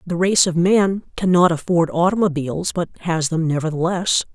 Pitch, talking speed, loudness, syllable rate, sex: 175 Hz, 150 wpm, -18 LUFS, 5.2 syllables/s, female